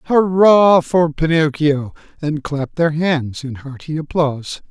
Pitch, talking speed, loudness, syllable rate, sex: 155 Hz, 130 wpm, -16 LUFS, 4.1 syllables/s, male